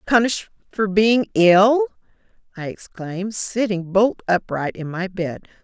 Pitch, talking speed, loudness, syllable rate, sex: 200 Hz, 130 wpm, -19 LUFS, 4.2 syllables/s, female